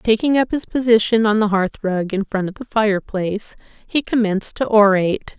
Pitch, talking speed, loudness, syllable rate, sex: 210 Hz, 180 wpm, -18 LUFS, 5.5 syllables/s, female